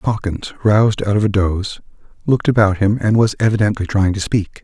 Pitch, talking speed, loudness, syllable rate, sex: 105 Hz, 195 wpm, -16 LUFS, 5.8 syllables/s, male